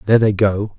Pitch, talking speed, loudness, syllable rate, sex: 105 Hz, 230 wpm, -16 LUFS, 6.4 syllables/s, male